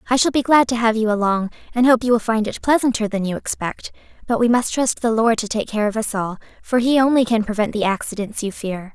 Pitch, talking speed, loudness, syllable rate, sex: 225 Hz, 260 wpm, -19 LUFS, 5.9 syllables/s, female